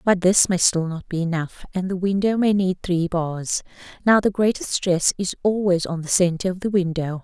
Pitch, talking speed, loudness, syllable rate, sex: 180 Hz, 215 wpm, -21 LUFS, 4.9 syllables/s, female